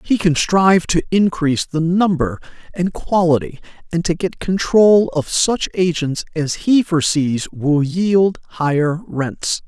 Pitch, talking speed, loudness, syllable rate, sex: 170 Hz, 145 wpm, -17 LUFS, 4.0 syllables/s, male